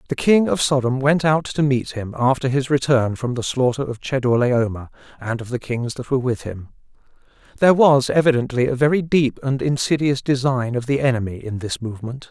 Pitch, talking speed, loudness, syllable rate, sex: 130 Hz, 195 wpm, -19 LUFS, 5.5 syllables/s, male